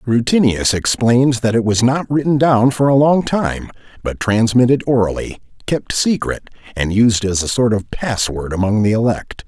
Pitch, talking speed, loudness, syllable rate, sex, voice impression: 120 Hz, 170 wpm, -16 LUFS, 4.7 syllables/s, male, very masculine, very adult-like, slightly old, very thick, very tensed, very powerful, very bright, soft, very clear, very fluent, slightly raspy, very cool, intellectual, very sincere, very calm, very mature, very friendly, very reassuring, very unique, elegant, wild, slightly sweet, lively, very kind